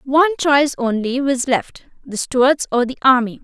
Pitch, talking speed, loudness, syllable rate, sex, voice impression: 260 Hz, 175 wpm, -17 LUFS, 4.8 syllables/s, female, very feminine, slightly adult-like, clear, slightly cute, slightly refreshing, friendly